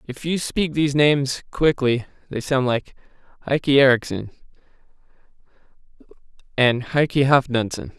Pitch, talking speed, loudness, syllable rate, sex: 135 Hz, 105 wpm, -20 LUFS, 4.9 syllables/s, male